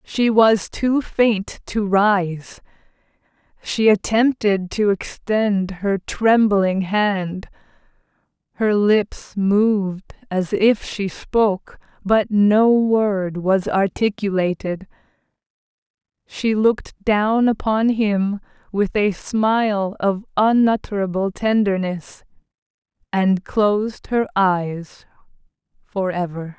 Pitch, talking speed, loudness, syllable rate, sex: 205 Hz, 90 wpm, -19 LUFS, 3.1 syllables/s, female